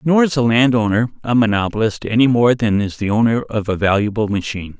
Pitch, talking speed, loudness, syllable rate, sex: 115 Hz, 215 wpm, -16 LUFS, 5.9 syllables/s, male